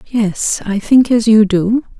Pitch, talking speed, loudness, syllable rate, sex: 220 Hz, 180 wpm, -13 LUFS, 3.6 syllables/s, female